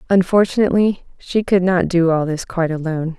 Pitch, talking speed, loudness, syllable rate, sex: 180 Hz, 170 wpm, -17 LUFS, 5.9 syllables/s, female